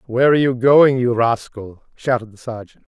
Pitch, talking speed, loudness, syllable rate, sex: 120 Hz, 185 wpm, -16 LUFS, 5.4 syllables/s, male